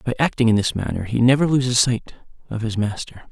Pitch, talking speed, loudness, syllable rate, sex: 120 Hz, 215 wpm, -20 LUFS, 6.2 syllables/s, male